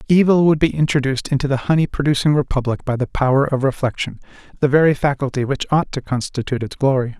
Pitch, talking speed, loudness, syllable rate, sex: 140 Hz, 185 wpm, -18 LUFS, 6.6 syllables/s, male